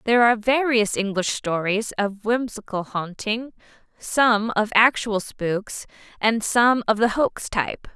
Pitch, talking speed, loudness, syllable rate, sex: 220 Hz, 135 wpm, -21 LUFS, 4.1 syllables/s, female